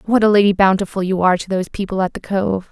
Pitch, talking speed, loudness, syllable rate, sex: 195 Hz, 265 wpm, -17 LUFS, 7.0 syllables/s, female